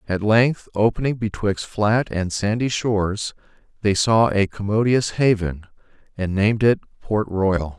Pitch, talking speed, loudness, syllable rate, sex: 105 Hz, 140 wpm, -20 LUFS, 4.3 syllables/s, male